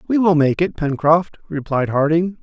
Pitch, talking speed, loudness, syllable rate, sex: 160 Hz, 175 wpm, -17 LUFS, 4.6 syllables/s, male